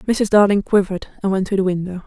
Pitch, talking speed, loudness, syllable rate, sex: 195 Hz, 230 wpm, -18 LUFS, 6.4 syllables/s, female